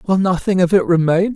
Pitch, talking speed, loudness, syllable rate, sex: 180 Hz, 220 wpm, -15 LUFS, 5.3 syllables/s, male